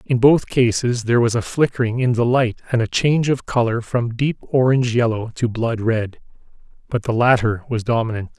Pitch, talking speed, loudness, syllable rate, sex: 120 Hz, 195 wpm, -19 LUFS, 5.3 syllables/s, male